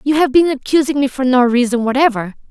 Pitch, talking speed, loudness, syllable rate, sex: 265 Hz, 215 wpm, -14 LUFS, 6.1 syllables/s, female